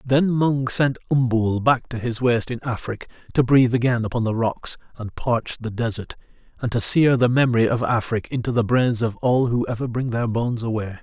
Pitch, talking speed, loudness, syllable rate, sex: 120 Hz, 205 wpm, -21 LUFS, 5.4 syllables/s, male